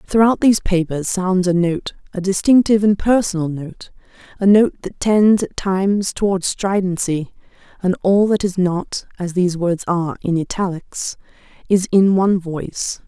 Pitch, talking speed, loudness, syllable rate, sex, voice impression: 185 Hz, 155 wpm, -18 LUFS, 4.8 syllables/s, female, very feminine, adult-like, slightly soft, slightly calm, elegant, slightly kind